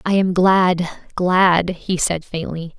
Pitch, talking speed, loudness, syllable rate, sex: 180 Hz, 150 wpm, -18 LUFS, 3.1 syllables/s, female